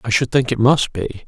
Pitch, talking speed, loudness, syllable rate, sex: 120 Hz, 285 wpm, -17 LUFS, 5.1 syllables/s, male